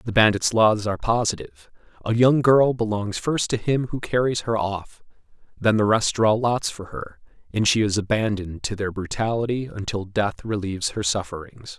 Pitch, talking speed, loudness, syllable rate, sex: 105 Hz, 180 wpm, -22 LUFS, 5.1 syllables/s, male